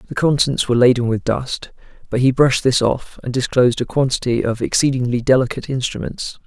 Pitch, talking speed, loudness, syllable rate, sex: 125 Hz, 175 wpm, -18 LUFS, 6.0 syllables/s, male